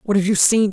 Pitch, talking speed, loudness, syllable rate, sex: 200 Hz, 335 wpm, -16 LUFS, 5.6 syllables/s, male